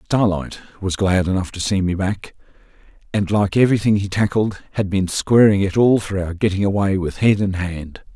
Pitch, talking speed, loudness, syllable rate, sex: 100 Hz, 190 wpm, -18 LUFS, 5.1 syllables/s, male